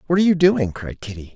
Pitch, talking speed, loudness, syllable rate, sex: 140 Hz, 265 wpm, -18 LUFS, 6.8 syllables/s, male